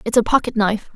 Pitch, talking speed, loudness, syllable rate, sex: 220 Hz, 250 wpm, -18 LUFS, 7.3 syllables/s, female